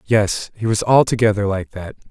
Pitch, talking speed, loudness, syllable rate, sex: 105 Hz, 170 wpm, -18 LUFS, 4.9 syllables/s, male